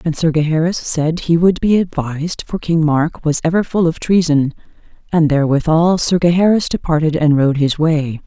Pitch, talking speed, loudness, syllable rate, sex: 160 Hz, 180 wpm, -15 LUFS, 5.1 syllables/s, female